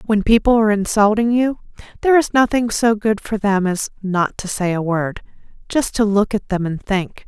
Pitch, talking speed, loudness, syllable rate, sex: 210 Hz, 200 wpm, -18 LUFS, 5.0 syllables/s, female